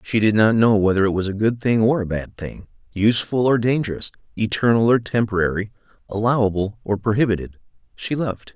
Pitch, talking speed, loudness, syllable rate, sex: 110 Hz, 175 wpm, -20 LUFS, 5.9 syllables/s, male